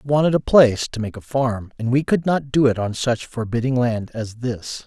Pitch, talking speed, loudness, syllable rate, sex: 125 Hz, 245 wpm, -20 LUFS, 5.2 syllables/s, male